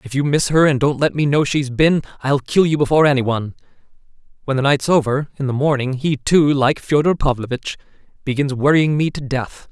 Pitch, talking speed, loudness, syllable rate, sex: 140 Hz, 205 wpm, -17 LUFS, 5.7 syllables/s, male